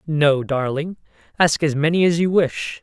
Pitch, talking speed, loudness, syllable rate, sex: 155 Hz, 170 wpm, -19 LUFS, 4.3 syllables/s, female